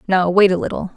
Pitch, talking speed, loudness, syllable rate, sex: 180 Hz, 250 wpm, -16 LUFS, 6.4 syllables/s, female